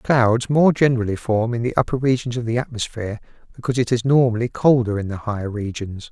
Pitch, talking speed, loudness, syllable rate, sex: 120 Hz, 195 wpm, -20 LUFS, 6.1 syllables/s, male